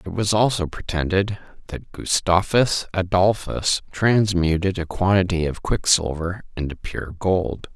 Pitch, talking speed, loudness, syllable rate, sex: 90 Hz, 115 wpm, -21 LUFS, 4.1 syllables/s, male